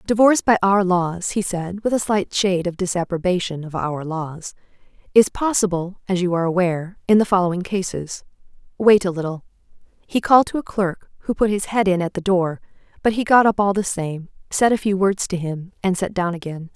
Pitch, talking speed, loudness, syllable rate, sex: 185 Hz, 210 wpm, -20 LUFS, 5.5 syllables/s, female